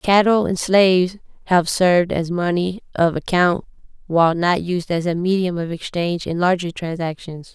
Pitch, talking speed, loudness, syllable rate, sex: 175 Hz, 160 wpm, -19 LUFS, 4.8 syllables/s, female